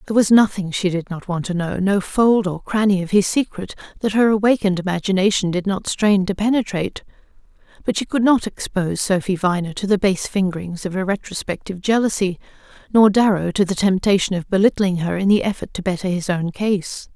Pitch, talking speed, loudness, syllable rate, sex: 195 Hz, 195 wpm, -19 LUFS, 5.8 syllables/s, female